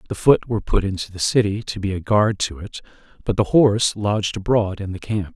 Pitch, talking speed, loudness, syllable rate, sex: 105 Hz, 235 wpm, -20 LUFS, 5.7 syllables/s, male